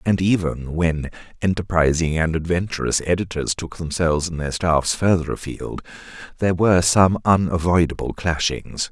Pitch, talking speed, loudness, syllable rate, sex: 85 Hz, 130 wpm, -20 LUFS, 5.0 syllables/s, male